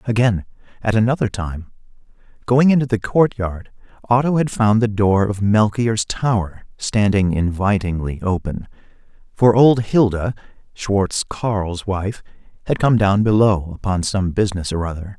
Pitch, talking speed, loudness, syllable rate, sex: 105 Hz, 140 wpm, -18 LUFS, 4.4 syllables/s, male